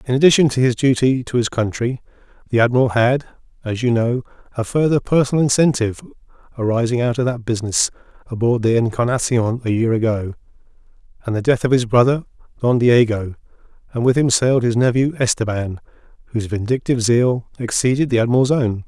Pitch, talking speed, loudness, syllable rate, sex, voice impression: 120 Hz, 160 wpm, -18 LUFS, 6.1 syllables/s, male, masculine, middle-aged, slightly relaxed, slightly powerful, slightly bright, soft, raspy, slightly intellectual, slightly mature, friendly, reassuring, wild, slightly lively, slightly strict